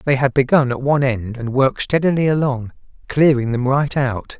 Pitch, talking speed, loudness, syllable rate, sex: 135 Hz, 190 wpm, -18 LUFS, 5.4 syllables/s, male